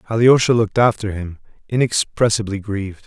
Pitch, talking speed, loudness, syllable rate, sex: 105 Hz, 115 wpm, -18 LUFS, 5.8 syllables/s, male